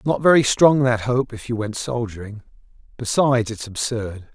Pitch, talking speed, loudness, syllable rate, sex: 120 Hz, 165 wpm, -20 LUFS, 4.9 syllables/s, male